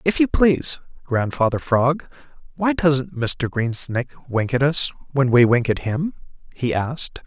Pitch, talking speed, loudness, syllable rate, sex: 135 Hz, 155 wpm, -20 LUFS, 4.4 syllables/s, male